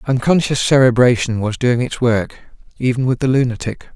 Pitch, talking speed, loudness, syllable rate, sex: 125 Hz, 150 wpm, -16 LUFS, 5.0 syllables/s, male